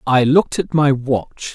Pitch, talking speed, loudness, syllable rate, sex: 140 Hz, 195 wpm, -16 LUFS, 4.2 syllables/s, male